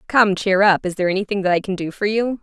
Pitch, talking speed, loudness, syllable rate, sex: 195 Hz, 295 wpm, -18 LUFS, 6.6 syllables/s, female